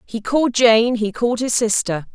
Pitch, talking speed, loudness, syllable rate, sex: 230 Hz, 195 wpm, -17 LUFS, 5.1 syllables/s, female